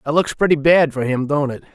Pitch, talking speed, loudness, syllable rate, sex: 145 Hz, 275 wpm, -17 LUFS, 5.9 syllables/s, male